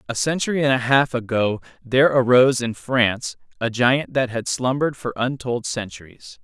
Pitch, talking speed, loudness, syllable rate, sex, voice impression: 125 Hz, 170 wpm, -20 LUFS, 5.2 syllables/s, male, masculine, adult-like, slightly cool, slightly intellectual, refreshing